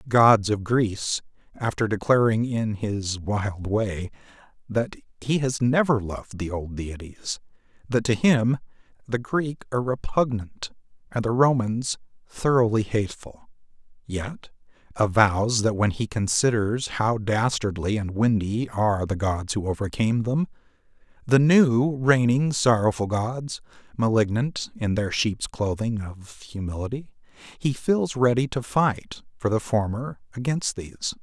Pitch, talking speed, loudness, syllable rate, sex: 115 Hz, 130 wpm, -24 LUFS, 4.2 syllables/s, male